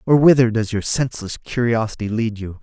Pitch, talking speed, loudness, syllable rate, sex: 115 Hz, 185 wpm, -19 LUFS, 5.6 syllables/s, male